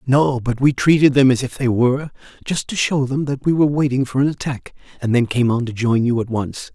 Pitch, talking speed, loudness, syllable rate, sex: 130 Hz, 260 wpm, -18 LUFS, 5.7 syllables/s, male